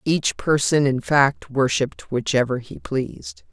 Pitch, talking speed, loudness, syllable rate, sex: 135 Hz, 135 wpm, -21 LUFS, 4.2 syllables/s, female